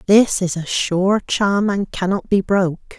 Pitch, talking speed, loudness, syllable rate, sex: 195 Hz, 180 wpm, -18 LUFS, 3.9 syllables/s, female